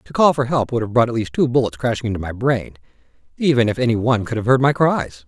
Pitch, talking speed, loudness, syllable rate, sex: 120 Hz, 275 wpm, -18 LUFS, 6.6 syllables/s, male